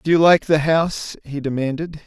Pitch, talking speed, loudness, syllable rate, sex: 155 Hz, 205 wpm, -19 LUFS, 5.2 syllables/s, male